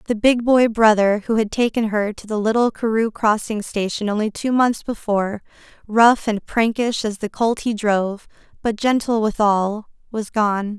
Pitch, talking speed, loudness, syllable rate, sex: 220 Hz, 170 wpm, -19 LUFS, 4.6 syllables/s, female